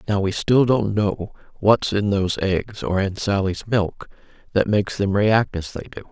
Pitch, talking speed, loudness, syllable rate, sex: 100 Hz, 195 wpm, -21 LUFS, 4.4 syllables/s, female